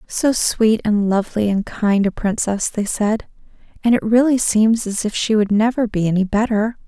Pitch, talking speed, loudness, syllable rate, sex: 215 Hz, 190 wpm, -18 LUFS, 4.8 syllables/s, female